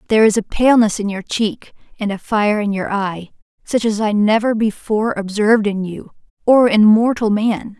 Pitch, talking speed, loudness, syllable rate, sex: 215 Hz, 190 wpm, -16 LUFS, 5.1 syllables/s, female